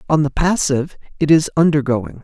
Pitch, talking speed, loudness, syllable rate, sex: 150 Hz, 160 wpm, -16 LUFS, 5.6 syllables/s, male